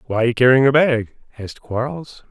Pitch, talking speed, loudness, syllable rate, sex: 125 Hz, 155 wpm, -17 LUFS, 4.7 syllables/s, male